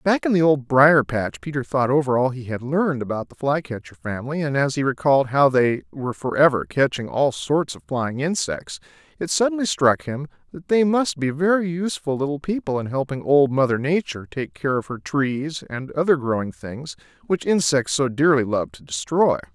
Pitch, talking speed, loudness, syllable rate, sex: 135 Hz, 195 wpm, -21 LUFS, 5.2 syllables/s, male